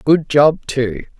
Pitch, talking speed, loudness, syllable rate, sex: 140 Hz, 150 wpm, -15 LUFS, 3.0 syllables/s, female